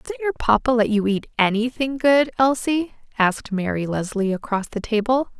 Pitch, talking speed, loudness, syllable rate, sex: 235 Hz, 165 wpm, -21 LUFS, 5.0 syllables/s, female